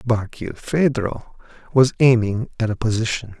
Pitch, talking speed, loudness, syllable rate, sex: 115 Hz, 105 wpm, -20 LUFS, 4.6 syllables/s, male